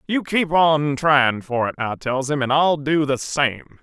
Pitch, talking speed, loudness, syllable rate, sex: 145 Hz, 220 wpm, -19 LUFS, 4.1 syllables/s, male